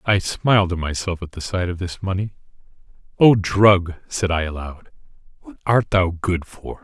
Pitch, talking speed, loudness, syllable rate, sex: 90 Hz, 175 wpm, -20 LUFS, 4.6 syllables/s, male